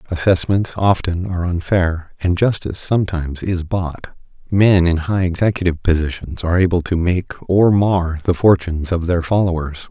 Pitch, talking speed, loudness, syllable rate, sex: 90 Hz, 150 wpm, -17 LUFS, 5.1 syllables/s, male